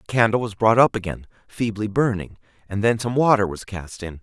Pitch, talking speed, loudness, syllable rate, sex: 105 Hz, 215 wpm, -21 LUFS, 5.6 syllables/s, male